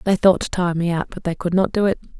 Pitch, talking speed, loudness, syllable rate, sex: 180 Hz, 330 wpm, -20 LUFS, 6.4 syllables/s, female